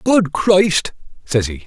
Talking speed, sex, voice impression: 145 wpm, male, masculine, adult-like, powerful, fluent, slightly unique, slightly intense